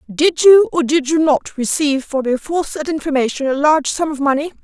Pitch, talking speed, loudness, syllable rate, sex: 295 Hz, 205 wpm, -16 LUFS, 6.0 syllables/s, female